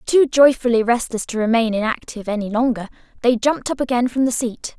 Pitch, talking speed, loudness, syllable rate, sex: 240 Hz, 190 wpm, -19 LUFS, 6.0 syllables/s, female